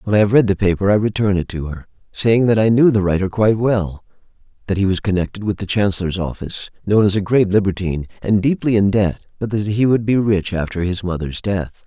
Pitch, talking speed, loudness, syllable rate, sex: 100 Hz, 235 wpm, -18 LUFS, 6.0 syllables/s, male